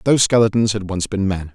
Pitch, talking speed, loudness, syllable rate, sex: 105 Hz, 235 wpm, -18 LUFS, 6.3 syllables/s, male